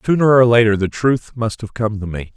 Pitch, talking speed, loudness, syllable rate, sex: 115 Hz, 255 wpm, -16 LUFS, 5.4 syllables/s, male